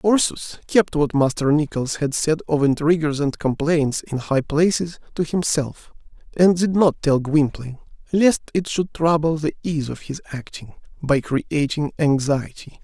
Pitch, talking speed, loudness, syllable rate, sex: 155 Hz, 155 wpm, -20 LUFS, 4.4 syllables/s, male